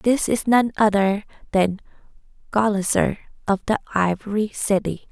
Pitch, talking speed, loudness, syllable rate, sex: 205 Hz, 115 wpm, -21 LUFS, 4.5 syllables/s, female